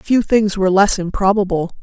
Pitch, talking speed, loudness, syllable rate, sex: 195 Hz, 165 wpm, -15 LUFS, 5.1 syllables/s, female